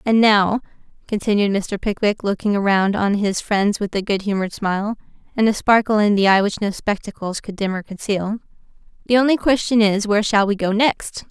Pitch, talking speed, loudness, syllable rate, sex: 205 Hz, 195 wpm, -19 LUFS, 5.3 syllables/s, female